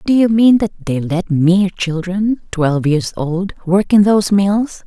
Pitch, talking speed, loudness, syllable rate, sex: 190 Hz, 185 wpm, -15 LUFS, 4.2 syllables/s, female